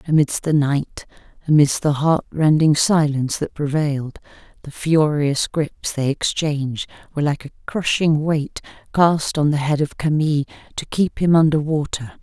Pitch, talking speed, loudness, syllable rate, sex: 150 Hz, 145 wpm, -19 LUFS, 4.6 syllables/s, female